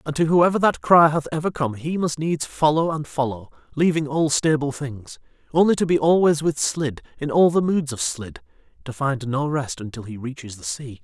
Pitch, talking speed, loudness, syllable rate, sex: 145 Hz, 210 wpm, -21 LUFS, 5.1 syllables/s, male